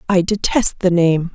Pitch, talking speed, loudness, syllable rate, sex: 180 Hz, 180 wpm, -16 LUFS, 4.3 syllables/s, female